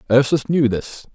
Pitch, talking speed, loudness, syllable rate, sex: 130 Hz, 155 wpm, -18 LUFS, 4.7 syllables/s, male